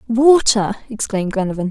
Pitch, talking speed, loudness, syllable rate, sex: 220 Hz, 105 wpm, -16 LUFS, 5.4 syllables/s, female